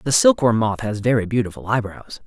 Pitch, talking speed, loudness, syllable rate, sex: 115 Hz, 185 wpm, -19 LUFS, 5.4 syllables/s, male